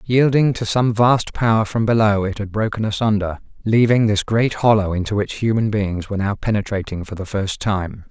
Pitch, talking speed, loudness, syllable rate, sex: 105 Hz, 190 wpm, -19 LUFS, 5.2 syllables/s, male